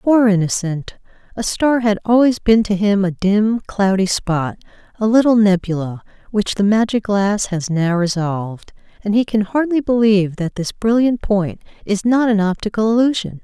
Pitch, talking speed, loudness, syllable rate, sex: 205 Hz, 165 wpm, -17 LUFS, 4.7 syllables/s, female